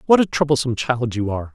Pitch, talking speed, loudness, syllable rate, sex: 130 Hz, 235 wpm, -20 LUFS, 7.1 syllables/s, male